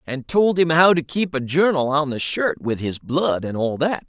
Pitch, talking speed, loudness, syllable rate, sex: 150 Hz, 250 wpm, -20 LUFS, 4.6 syllables/s, male